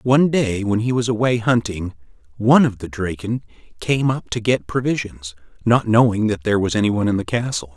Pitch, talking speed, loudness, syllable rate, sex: 110 Hz, 195 wpm, -19 LUFS, 5.6 syllables/s, male